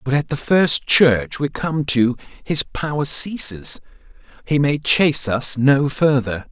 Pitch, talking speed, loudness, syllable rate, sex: 140 Hz, 155 wpm, -18 LUFS, 3.8 syllables/s, male